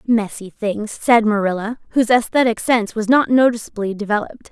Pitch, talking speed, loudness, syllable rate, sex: 220 Hz, 145 wpm, -18 LUFS, 5.9 syllables/s, female